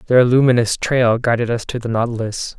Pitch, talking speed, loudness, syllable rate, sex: 120 Hz, 185 wpm, -17 LUFS, 5.1 syllables/s, male